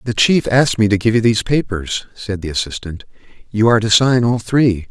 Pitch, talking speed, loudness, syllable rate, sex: 110 Hz, 220 wpm, -15 LUFS, 5.6 syllables/s, male